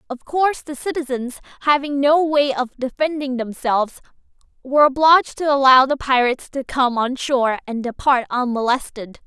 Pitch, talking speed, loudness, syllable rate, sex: 270 Hz, 150 wpm, -18 LUFS, 5.2 syllables/s, female